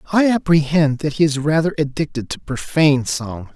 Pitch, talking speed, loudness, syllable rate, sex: 150 Hz, 170 wpm, -18 LUFS, 5.2 syllables/s, male